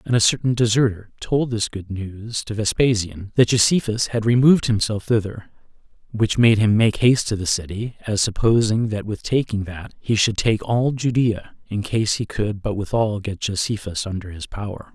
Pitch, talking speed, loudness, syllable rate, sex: 110 Hz, 185 wpm, -20 LUFS, 4.9 syllables/s, male